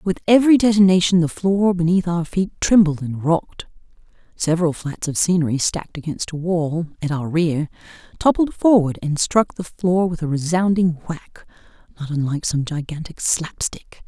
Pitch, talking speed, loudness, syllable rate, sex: 170 Hz, 160 wpm, -19 LUFS, 5.0 syllables/s, female